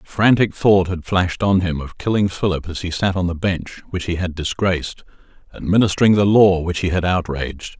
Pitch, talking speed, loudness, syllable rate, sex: 90 Hz, 210 wpm, -18 LUFS, 5.5 syllables/s, male